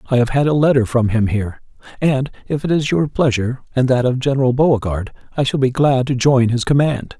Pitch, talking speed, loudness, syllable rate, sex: 130 Hz, 225 wpm, -17 LUFS, 5.9 syllables/s, male